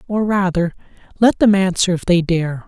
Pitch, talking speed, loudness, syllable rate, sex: 185 Hz, 180 wpm, -16 LUFS, 4.8 syllables/s, male